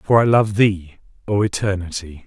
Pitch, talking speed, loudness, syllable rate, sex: 100 Hz, 160 wpm, -18 LUFS, 4.6 syllables/s, male